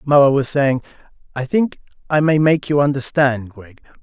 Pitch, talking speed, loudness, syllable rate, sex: 140 Hz, 165 wpm, -17 LUFS, 4.5 syllables/s, male